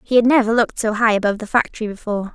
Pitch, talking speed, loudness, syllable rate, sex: 220 Hz, 255 wpm, -18 LUFS, 8.0 syllables/s, female